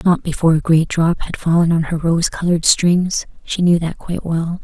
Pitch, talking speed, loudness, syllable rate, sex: 170 Hz, 205 wpm, -17 LUFS, 5.3 syllables/s, female